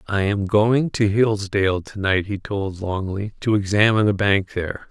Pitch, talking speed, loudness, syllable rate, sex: 100 Hz, 185 wpm, -20 LUFS, 4.7 syllables/s, male